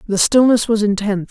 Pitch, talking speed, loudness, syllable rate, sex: 215 Hz, 185 wpm, -15 LUFS, 6.0 syllables/s, female